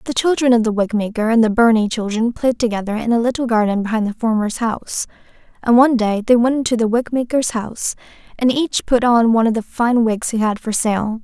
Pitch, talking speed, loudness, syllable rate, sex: 230 Hz, 230 wpm, -17 LUFS, 5.9 syllables/s, female